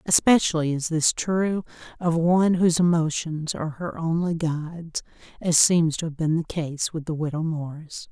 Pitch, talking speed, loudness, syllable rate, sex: 165 Hz, 170 wpm, -23 LUFS, 4.9 syllables/s, female